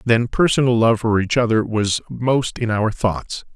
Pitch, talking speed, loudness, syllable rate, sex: 115 Hz, 185 wpm, -18 LUFS, 4.2 syllables/s, male